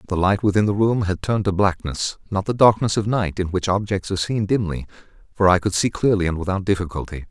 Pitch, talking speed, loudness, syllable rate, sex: 100 Hz, 230 wpm, -20 LUFS, 6.1 syllables/s, male